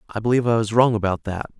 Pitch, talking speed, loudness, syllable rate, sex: 110 Hz, 265 wpm, -20 LUFS, 7.6 syllables/s, male